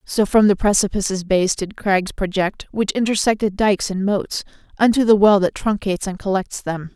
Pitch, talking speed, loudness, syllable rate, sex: 200 Hz, 180 wpm, -19 LUFS, 5.1 syllables/s, female